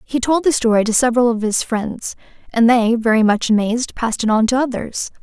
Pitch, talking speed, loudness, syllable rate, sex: 235 Hz, 220 wpm, -16 LUFS, 5.7 syllables/s, female